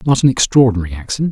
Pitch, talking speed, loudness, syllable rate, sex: 120 Hz, 180 wpm, -14 LUFS, 8.1 syllables/s, male